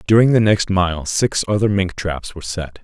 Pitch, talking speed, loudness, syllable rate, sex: 95 Hz, 210 wpm, -18 LUFS, 4.9 syllables/s, male